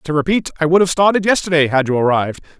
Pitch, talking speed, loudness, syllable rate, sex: 160 Hz, 230 wpm, -15 LUFS, 6.9 syllables/s, male